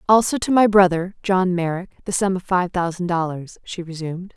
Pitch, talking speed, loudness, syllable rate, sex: 185 Hz, 195 wpm, -20 LUFS, 5.3 syllables/s, female